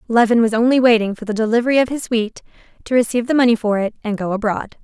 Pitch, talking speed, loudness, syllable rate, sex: 230 Hz, 235 wpm, -17 LUFS, 7.0 syllables/s, female